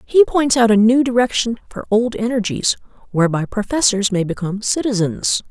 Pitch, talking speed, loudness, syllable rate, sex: 225 Hz, 155 wpm, -17 LUFS, 5.3 syllables/s, female